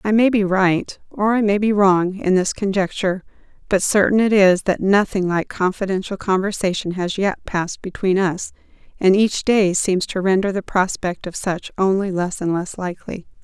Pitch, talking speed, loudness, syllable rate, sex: 190 Hz, 185 wpm, -19 LUFS, 4.9 syllables/s, female